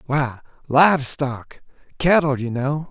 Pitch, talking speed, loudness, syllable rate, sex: 140 Hz, 125 wpm, -19 LUFS, 3.3 syllables/s, male